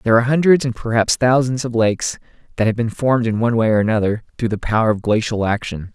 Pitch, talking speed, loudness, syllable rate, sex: 115 Hz, 230 wpm, -18 LUFS, 6.8 syllables/s, male